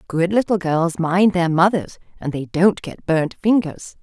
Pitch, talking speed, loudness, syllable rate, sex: 180 Hz, 180 wpm, -18 LUFS, 4.2 syllables/s, female